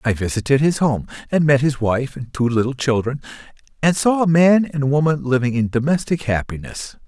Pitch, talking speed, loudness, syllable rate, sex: 135 Hz, 185 wpm, -18 LUFS, 5.3 syllables/s, male